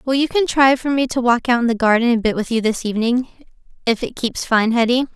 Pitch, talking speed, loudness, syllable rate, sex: 240 Hz, 255 wpm, -17 LUFS, 6.3 syllables/s, female